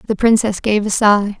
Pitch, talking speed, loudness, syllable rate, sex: 210 Hz, 215 wpm, -15 LUFS, 4.4 syllables/s, female